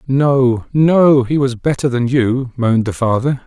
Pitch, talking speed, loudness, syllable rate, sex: 130 Hz, 175 wpm, -14 LUFS, 4.1 syllables/s, male